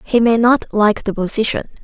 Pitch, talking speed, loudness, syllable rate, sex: 220 Hz, 195 wpm, -15 LUFS, 5.1 syllables/s, female